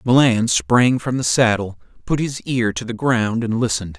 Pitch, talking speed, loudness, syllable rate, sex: 115 Hz, 195 wpm, -18 LUFS, 4.7 syllables/s, male